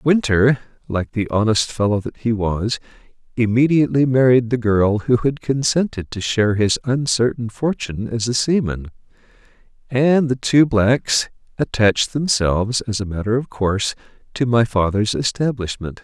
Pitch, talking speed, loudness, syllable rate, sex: 115 Hz, 140 wpm, -18 LUFS, 4.8 syllables/s, male